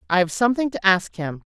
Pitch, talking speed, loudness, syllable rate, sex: 200 Hz, 200 wpm, -21 LUFS, 6.3 syllables/s, female